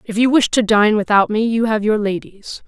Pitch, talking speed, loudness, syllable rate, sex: 215 Hz, 245 wpm, -16 LUFS, 5.1 syllables/s, female